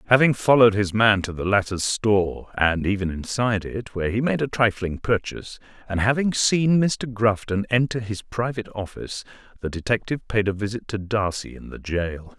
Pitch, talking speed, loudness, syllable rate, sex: 110 Hz, 180 wpm, -22 LUFS, 5.3 syllables/s, male